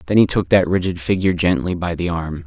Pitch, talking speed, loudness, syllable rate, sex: 85 Hz, 245 wpm, -18 LUFS, 6.1 syllables/s, male